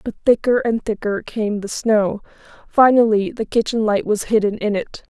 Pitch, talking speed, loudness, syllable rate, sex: 215 Hz, 175 wpm, -18 LUFS, 4.8 syllables/s, female